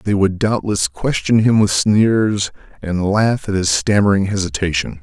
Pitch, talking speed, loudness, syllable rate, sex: 100 Hz, 155 wpm, -16 LUFS, 4.3 syllables/s, male